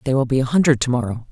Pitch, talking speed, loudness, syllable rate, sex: 130 Hz, 320 wpm, -18 LUFS, 8.5 syllables/s, male